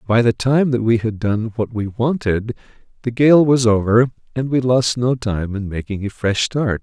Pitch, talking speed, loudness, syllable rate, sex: 115 Hz, 210 wpm, -18 LUFS, 4.6 syllables/s, male